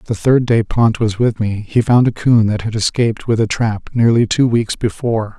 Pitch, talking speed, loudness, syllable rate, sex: 110 Hz, 235 wpm, -15 LUFS, 4.9 syllables/s, male